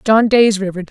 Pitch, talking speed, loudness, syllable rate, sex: 210 Hz, 265 wpm, -13 LUFS, 5.8 syllables/s, female